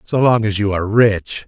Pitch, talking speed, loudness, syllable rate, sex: 105 Hz, 245 wpm, -16 LUFS, 5.1 syllables/s, male